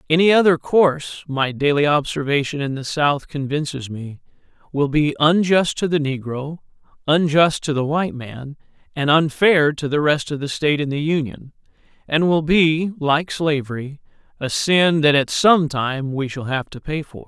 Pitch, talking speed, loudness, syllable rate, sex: 150 Hz, 175 wpm, -19 LUFS, 4.6 syllables/s, male